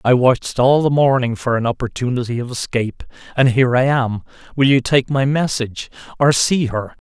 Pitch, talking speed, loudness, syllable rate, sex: 125 Hz, 180 wpm, -17 LUFS, 5.6 syllables/s, male